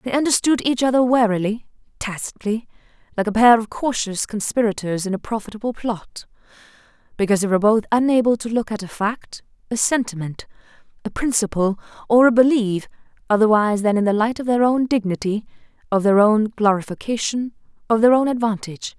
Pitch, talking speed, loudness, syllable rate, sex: 220 Hz, 160 wpm, -19 LUFS, 5.8 syllables/s, female